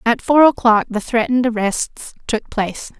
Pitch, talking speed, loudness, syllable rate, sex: 235 Hz, 160 wpm, -17 LUFS, 4.8 syllables/s, female